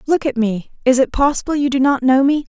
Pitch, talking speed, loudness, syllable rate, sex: 270 Hz, 260 wpm, -16 LUFS, 5.9 syllables/s, female